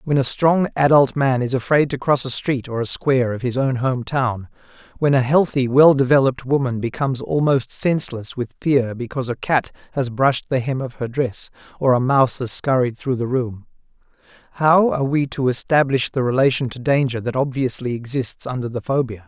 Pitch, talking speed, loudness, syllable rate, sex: 130 Hz, 190 wpm, -19 LUFS, 5.4 syllables/s, male